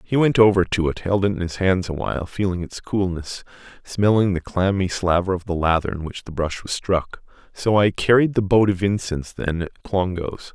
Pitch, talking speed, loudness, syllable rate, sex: 95 Hz, 210 wpm, -21 LUFS, 5.3 syllables/s, male